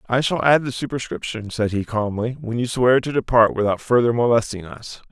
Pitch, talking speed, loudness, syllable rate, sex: 120 Hz, 200 wpm, -20 LUFS, 5.3 syllables/s, male